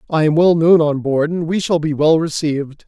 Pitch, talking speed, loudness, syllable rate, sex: 160 Hz, 250 wpm, -16 LUFS, 5.7 syllables/s, male